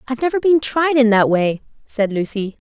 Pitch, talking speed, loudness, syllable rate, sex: 245 Hz, 200 wpm, -17 LUFS, 5.4 syllables/s, female